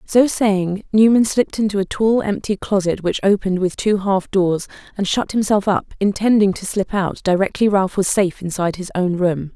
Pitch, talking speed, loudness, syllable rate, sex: 195 Hz, 195 wpm, -18 LUFS, 5.1 syllables/s, female